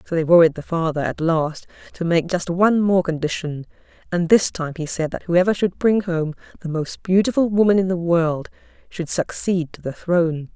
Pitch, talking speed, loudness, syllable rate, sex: 170 Hz, 200 wpm, -20 LUFS, 5.1 syllables/s, female